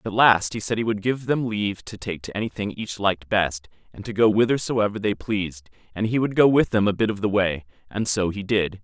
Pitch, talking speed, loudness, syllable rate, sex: 105 Hz, 250 wpm, -23 LUFS, 5.6 syllables/s, male